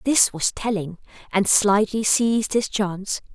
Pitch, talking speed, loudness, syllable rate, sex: 210 Hz, 145 wpm, -21 LUFS, 4.4 syllables/s, female